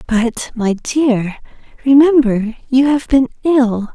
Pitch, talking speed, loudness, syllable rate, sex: 250 Hz, 120 wpm, -14 LUFS, 3.6 syllables/s, female